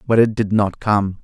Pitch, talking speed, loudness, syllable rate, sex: 105 Hz, 245 wpm, -18 LUFS, 4.5 syllables/s, male